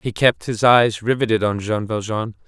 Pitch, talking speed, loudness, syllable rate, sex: 110 Hz, 195 wpm, -19 LUFS, 4.7 syllables/s, male